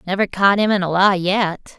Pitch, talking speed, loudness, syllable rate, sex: 190 Hz, 235 wpm, -17 LUFS, 4.9 syllables/s, female